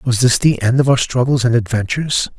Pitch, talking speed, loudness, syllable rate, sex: 125 Hz, 225 wpm, -15 LUFS, 5.6 syllables/s, male